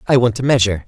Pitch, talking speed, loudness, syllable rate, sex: 115 Hz, 275 wpm, -15 LUFS, 8.5 syllables/s, male